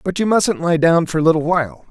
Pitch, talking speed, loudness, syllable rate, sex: 165 Hz, 285 wpm, -16 LUFS, 6.2 syllables/s, male